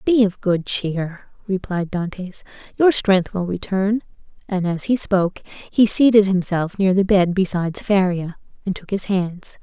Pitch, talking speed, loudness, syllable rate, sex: 190 Hz, 160 wpm, -19 LUFS, 4.3 syllables/s, female